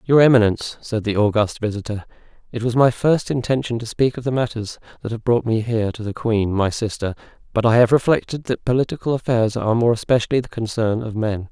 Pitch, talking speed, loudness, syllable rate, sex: 115 Hz, 210 wpm, -20 LUFS, 6.0 syllables/s, male